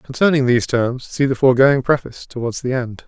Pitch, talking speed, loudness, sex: 130 Hz, 195 wpm, -17 LUFS, male